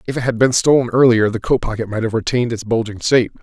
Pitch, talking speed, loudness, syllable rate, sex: 115 Hz, 265 wpm, -16 LUFS, 6.7 syllables/s, male